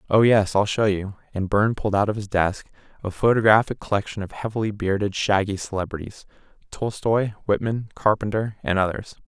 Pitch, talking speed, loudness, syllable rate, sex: 105 Hz, 150 wpm, -22 LUFS, 5.7 syllables/s, male